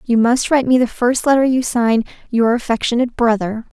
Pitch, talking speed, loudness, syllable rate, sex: 240 Hz, 190 wpm, -16 LUFS, 5.7 syllables/s, female